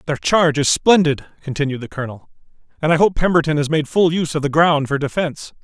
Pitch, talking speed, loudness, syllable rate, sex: 155 Hz, 215 wpm, -17 LUFS, 6.5 syllables/s, male